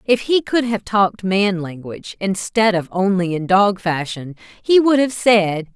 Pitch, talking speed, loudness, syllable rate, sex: 200 Hz, 175 wpm, -17 LUFS, 4.3 syllables/s, female